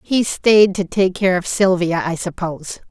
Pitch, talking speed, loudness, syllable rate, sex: 185 Hz, 185 wpm, -17 LUFS, 4.4 syllables/s, female